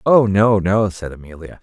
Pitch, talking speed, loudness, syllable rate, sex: 100 Hz, 185 wpm, -16 LUFS, 4.6 syllables/s, male